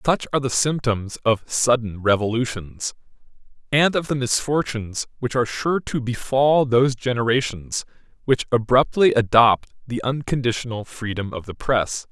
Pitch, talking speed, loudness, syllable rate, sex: 125 Hz, 135 wpm, -21 LUFS, 4.8 syllables/s, male